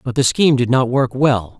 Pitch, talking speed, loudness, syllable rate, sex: 125 Hz, 265 wpm, -16 LUFS, 5.4 syllables/s, male